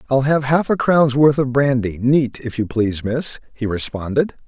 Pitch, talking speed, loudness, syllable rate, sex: 130 Hz, 200 wpm, -18 LUFS, 4.7 syllables/s, male